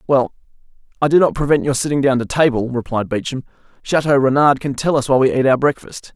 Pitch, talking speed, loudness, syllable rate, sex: 135 Hz, 215 wpm, -16 LUFS, 6.3 syllables/s, male